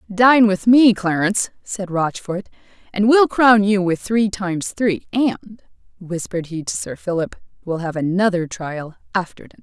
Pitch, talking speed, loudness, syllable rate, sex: 195 Hz, 160 wpm, -18 LUFS, 4.6 syllables/s, female